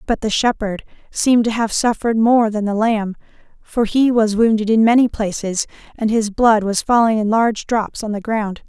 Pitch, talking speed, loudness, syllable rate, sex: 220 Hz, 200 wpm, -17 LUFS, 5.1 syllables/s, female